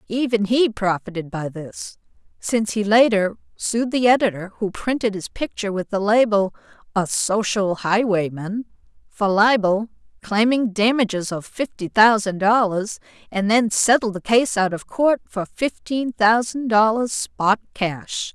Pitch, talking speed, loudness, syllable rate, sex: 210 Hz, 140 wpm, -20 LUFS, 4.3 syllables/s, female